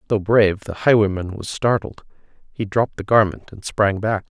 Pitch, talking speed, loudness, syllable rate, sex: 105 Hz, 180 wpm, -19 LUFS, 5.2 syllables/s, male